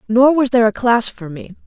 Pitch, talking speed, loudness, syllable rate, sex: 235 Hz, 250 wpm, -14 LUFS, 5.6 syllables/s, female